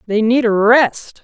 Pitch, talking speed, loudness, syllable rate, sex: 230 Hz, 195 wpm, -13 LUFS, 3.6 syllables/s, female